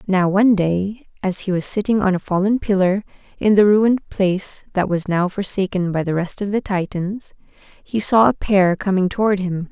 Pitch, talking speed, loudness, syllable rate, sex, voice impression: 195 Hz, 200 wpm, -18 LUFS, 5.0 syllables/s, female, feminine, adult-like, slightly intellectual, slightly calm, friendly, slightly sweet